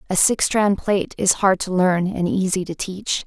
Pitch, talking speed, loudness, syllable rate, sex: 190 Hz, 220 wpm, -20 LUFS, 4.3 syllables/s, female